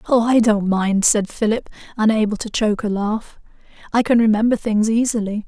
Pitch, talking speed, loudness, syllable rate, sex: 215 Hz, 175 wpm, -18 LUFS, 5.3 syllables/s, female